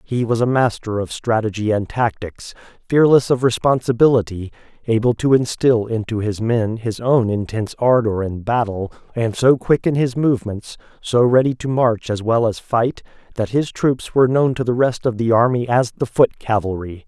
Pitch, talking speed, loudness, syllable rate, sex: 115 Hz, 185 wpm, -18 LUFS, 5.0 syllables/s, male